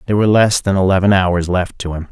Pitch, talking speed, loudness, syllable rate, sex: 95 Hz, 255 wpm, -14 LUFS, 6.7 syllables/s, male